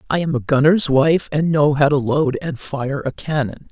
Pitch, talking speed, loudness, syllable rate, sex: 150 Hz, 225 wpm, -18 LUFS, 4.6 syllables/s, female